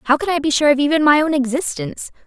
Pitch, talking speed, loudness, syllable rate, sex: 285 Hz, 265 wpm, -16 LUFS, 6.7 syllables/s, female